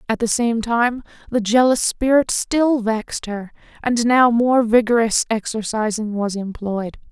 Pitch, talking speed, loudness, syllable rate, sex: 230 Hz, 145 wpm, -18 LUFS, 4.2 syllables/s, female